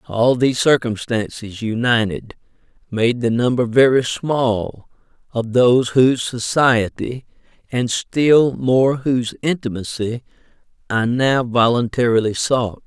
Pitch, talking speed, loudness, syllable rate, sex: 120 Hz, 105 wpm, -18 LUFS, 4.0 syllables/s, male